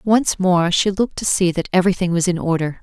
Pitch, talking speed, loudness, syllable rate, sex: 185 Hz, 235 wpm, -18 LUFS, 5.8 syllables/s, female